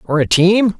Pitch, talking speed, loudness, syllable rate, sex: 185 Hz, 225 wpm, -13 LUFS, 4.4 syllables/s, male